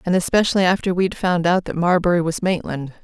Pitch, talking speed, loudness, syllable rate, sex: 175 Hz, 195 wpm, -19 LUFS, 6.0 syllables/s, female